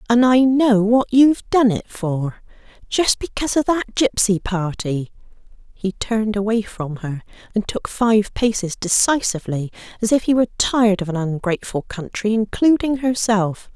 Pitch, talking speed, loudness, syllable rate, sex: 215 Hz, 150 wpm, -19 LUFS, 4.8 syllables/s, female